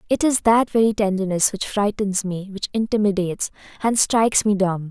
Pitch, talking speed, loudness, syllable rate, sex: 205 Hz, 170 wpm, -20 LUFS, 5.3 syllables/s, female